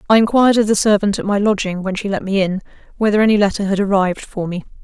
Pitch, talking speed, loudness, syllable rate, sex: 200 Hz, 250 wpm, -16 LUFS, 7.0 syllables/s, female